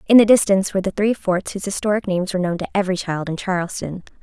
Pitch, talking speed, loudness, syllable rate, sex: 190 Hz, 240 wpm, -19 LUFS, 7.7 syllables/s, female